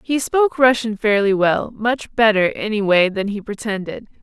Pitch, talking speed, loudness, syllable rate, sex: 215 Hz, 155 wpm, -18 LUFS, 4.8 syllables/s, female